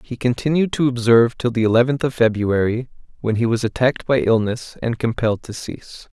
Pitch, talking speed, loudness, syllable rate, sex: 120 Hz, 185 wpm, -19 LUFS, 5.8 syllables/s, male